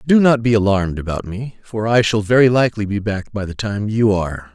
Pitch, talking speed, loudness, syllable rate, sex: 105 Hz, 240 wpm, -17 LUFS, 5.7 syllables/s, male